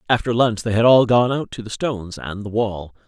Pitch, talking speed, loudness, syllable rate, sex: 110 Hz, 255 wpm, -19 LUFS, 5.4 syllables/s, male